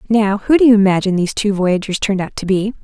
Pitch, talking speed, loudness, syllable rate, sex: 205 Hz, 255 wpm, -15 LUFS, 7.0 syllables/s, female